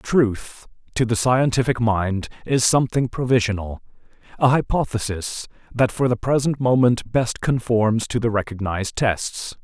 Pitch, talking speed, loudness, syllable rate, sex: 115 Hz, 130 wpm, -21 LUFS, 4.4 syllables/s, male